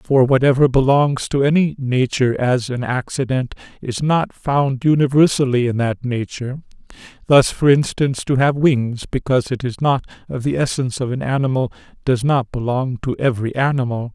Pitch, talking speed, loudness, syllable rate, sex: 130 Hz, 160 wpm, -18 LUFS, 5.2 syllables/s, male